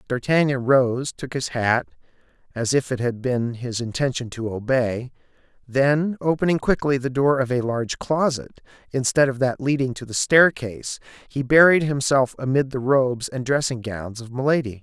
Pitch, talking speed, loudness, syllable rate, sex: 130 Hz, 165 wpm, -21 LUFS, 4.9 syllables/s, male